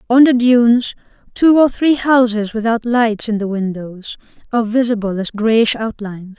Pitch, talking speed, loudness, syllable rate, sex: 230 Hz, 160 wpm, -15 LUFS, 4.8 syllables/s, female